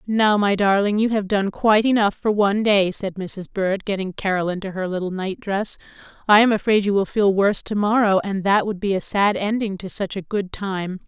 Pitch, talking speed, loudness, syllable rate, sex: 200 Hz, 225 wpm, -20 LUFS, 5.2 syllables/s, female